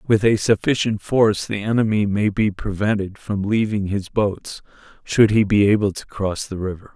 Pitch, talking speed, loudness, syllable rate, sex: 105 Hz, 180 wpm, -20 LUFS, 4.9 syllables/s, male